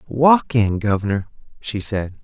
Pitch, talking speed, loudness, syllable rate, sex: 110 Hz, 135 wpm, -19 LUFS, 4.1 syllables/s, male